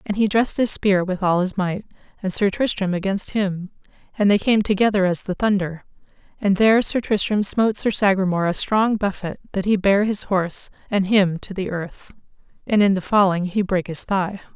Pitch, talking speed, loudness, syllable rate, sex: 195 Hz, 200 wpm, -20 LUFS, 5.4 syllables/s, female